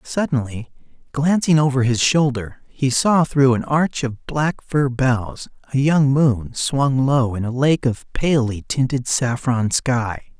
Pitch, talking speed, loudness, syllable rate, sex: 130 Hz, 155 wpm, -19 LUFS, 3.8 syllables/s, male